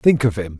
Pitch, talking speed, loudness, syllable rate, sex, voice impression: 110 Hz, 300 wpm, -19 LUFS, 5.5 syllables/s, male, masculine, middle-aged, thick, slightly tensed, slightly powerful, slightly hard, clear, slightly raspy, calm, mature, wild, lively, slightly strict